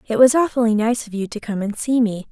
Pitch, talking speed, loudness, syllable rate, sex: 225 Hz, 285 wpm, -19 LUFS, 6.0 syllables/s, female